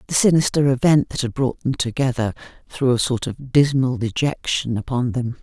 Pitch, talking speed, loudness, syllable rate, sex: 130 Hz, 175 wpm, -20 LUFS, 5.1 syllables/s, female